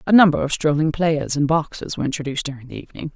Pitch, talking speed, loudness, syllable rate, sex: 150 Hz, 230 wpm, -20 LUFS, 7.3 syllables/s, female